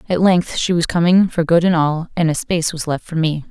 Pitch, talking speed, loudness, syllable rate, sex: 165 Hz, 275 wpm, -17 LUFS, 5.6 syllables/s, female